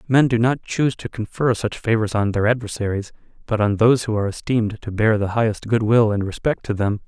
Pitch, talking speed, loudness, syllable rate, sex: 110 Hz, 230 wpm, -20 LUFS, 6.0 syllables/s, male